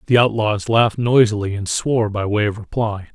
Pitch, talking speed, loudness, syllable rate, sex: 110 Hz, 190 wpm, -18 LUFS, 5.5 syllables/s, male